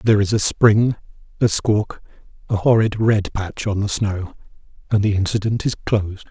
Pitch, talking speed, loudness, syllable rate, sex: 105 Hz, 170 wpm, -19 LUFS, 4.9 syllables/s, male